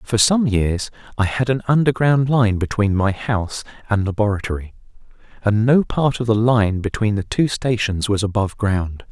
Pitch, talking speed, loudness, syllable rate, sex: 110 Hz, 170 wpm, -19 LUFS, 4.9 syllables/s, male